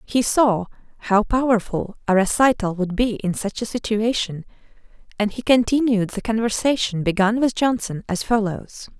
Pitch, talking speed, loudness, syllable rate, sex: 220 Hz, 145 wpm, -20 LUFS, 4.8 syllables/s, female